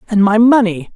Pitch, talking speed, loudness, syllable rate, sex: 210 Hz, 190 wpm, -12 LUFS, 5.3 syllables/s, male